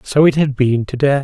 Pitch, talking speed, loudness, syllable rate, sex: 135 Hz, 245 wpm, -15 LUFS, 5.3 syllables/s, male